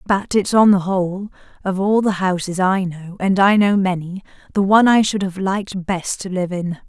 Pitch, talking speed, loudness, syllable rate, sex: 190 Hz, 220 wpm, -18 LUFS, 5.1 syllables/s, female